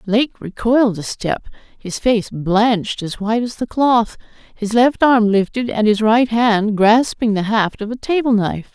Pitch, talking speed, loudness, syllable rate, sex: 220 Hz, 185 wpm, -16 LUFS, 4.4 syllables/s, female